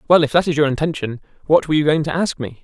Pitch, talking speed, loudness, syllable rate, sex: 150 Hz, 275 wpm, -18 LUFS, 7.4 syllables/s, male